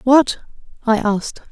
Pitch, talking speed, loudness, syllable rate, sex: 235 Hz, 120 wpm, -18 LUFS, 4.5 syllables/s, female